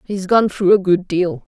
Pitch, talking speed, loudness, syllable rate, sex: 190 Hz, 230 wpm, -16 LUFS, 4.4 syllables/s, female